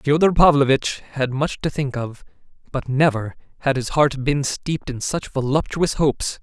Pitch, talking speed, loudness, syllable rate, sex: 140 Hz, 170 wpm, -20 LUFS, 4.8 syllables/s, male